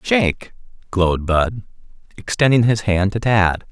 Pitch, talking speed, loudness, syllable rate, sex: 105 Hz, 130 wpm, -18 LUFS, 4.5 syllables/s, male